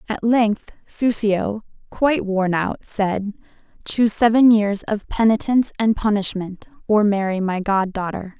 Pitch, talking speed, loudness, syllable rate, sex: 210 Hz, 130 wpm, -19 LUFS, 4.3 syllables/s, female